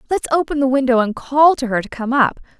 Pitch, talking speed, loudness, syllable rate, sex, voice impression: 265 Hz, 255 wpm, -17 LUFS, 6.0 syllables/s, female, feminine, slightly adult-like, slightly fluent, slightly intellectual, slightly lively